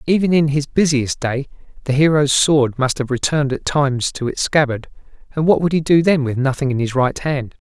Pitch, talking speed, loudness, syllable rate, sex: 140 Hz, 220 wpm, -17 LUFS, 5.5 syllables/s, male